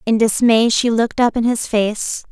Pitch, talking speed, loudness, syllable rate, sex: 225 Hz, 205 wpm, -16 LUFS, 4.7 syllables/s, female